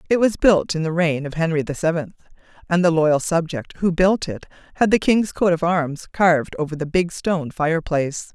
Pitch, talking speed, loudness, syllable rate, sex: 170 Hz, 210 wpm, -20 LUFS, 5.4 syllables/s, female